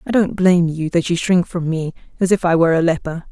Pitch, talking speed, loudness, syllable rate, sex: 170 Hz, 270 wpm, -17 LUFS, 6.1 syllables/s, female